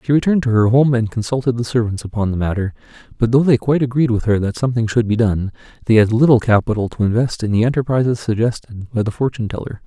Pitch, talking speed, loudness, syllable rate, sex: 115 Hz, 230 wpm, -17 LUFS, 6.8 syllables/s, male